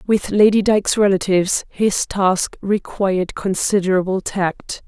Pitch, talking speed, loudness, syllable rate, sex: 195 Hz, 110 wpm, -18 LUFS, 4.3 syllables/s, female